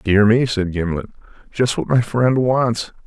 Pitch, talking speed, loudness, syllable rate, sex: 110 Hz, 175 wpm, -18 LUFS, 4.1 syllables/s, male